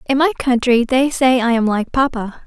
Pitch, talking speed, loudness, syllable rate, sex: 250 Hz, 220 wpm, -16 LUFS, 5.0 syllables/s, female